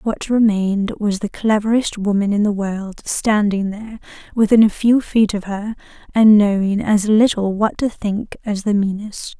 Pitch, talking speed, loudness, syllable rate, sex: 210 Hz, 170 wpm, -17 LUFS, 4.6 syllables/s, female